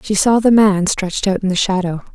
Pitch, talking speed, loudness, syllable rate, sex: 195 Hz, 250 wpm, -15 LUFS, 5.6 syllables/s, female